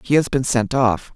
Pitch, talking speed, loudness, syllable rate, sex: 135 Hz, 260 wpm, -19 LUFS, 4.8 syllables/s, female